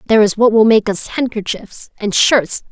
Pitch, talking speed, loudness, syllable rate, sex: 215 Hz, 200 wpm, -14 LUFS, 5.0 syllables/s, female